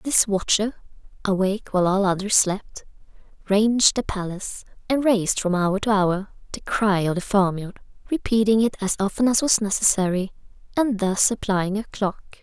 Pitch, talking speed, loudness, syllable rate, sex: 205 Hz, 160 wpm, -22 LUFS, 5.1 syllables/s, female